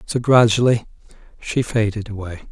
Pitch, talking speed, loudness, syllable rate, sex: 110 Hz, 120 wpm, -18 LUFS, 5.0 syllables/s, male